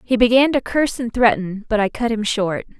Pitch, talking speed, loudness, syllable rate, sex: 230 Hz, 235 wpm, -18 LUFS, 5.5 syllables/s, female